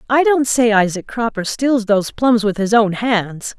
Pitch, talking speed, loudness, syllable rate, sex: 225 Hz, 200 wpm, -16 LUFS, 4.4 syllables/s, female